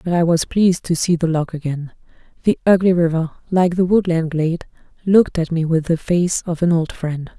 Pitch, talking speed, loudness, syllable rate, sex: 170 Hz, 210 wpm, -18 LUFS, 5.4 syllables/s, female